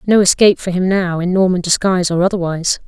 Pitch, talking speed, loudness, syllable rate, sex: 180 Hz, 210 wpm, -14 LUFS, 6.7 syllables/s, female